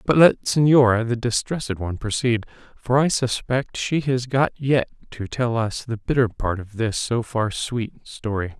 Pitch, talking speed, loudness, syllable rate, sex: 120 Hz, 180 wpm, -22 LUFS, 4.5 syllables/s, male